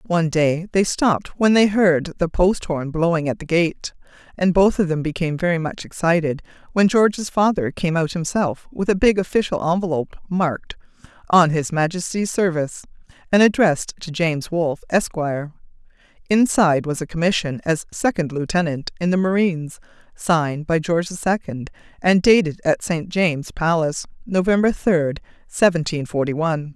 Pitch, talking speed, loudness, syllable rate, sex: 170 Hz, 155 wpm, -20 LUFS, 5.3 syllables/s, female